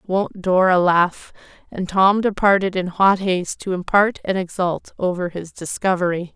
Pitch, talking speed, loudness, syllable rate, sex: 185 Hz, 150 wpm, -19 LUFS, 4.4 syllables/s, female